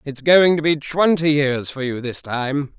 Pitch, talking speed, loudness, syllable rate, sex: 145 Hz, 215 wpm, -18 LUFS, 4.1 syllables/s, male